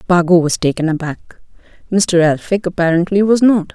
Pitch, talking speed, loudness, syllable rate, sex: 180 Hz, 145 wpm, -14 LUFS, 5.0 syllables/s, female